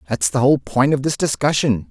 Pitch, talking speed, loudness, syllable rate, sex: 125 Hz, 220 wpm, -18 LUFS, 5.9 syllables/s, male